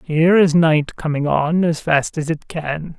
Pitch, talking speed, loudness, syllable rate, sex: 160 Hz, 200 wpm, -17 LUFS, 4.2 syllables/s, female